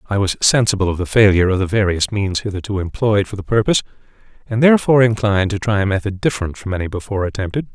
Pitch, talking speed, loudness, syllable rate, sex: 105 Hz, 210 wpm, -17 LUFS, 7.2 syllables/s, male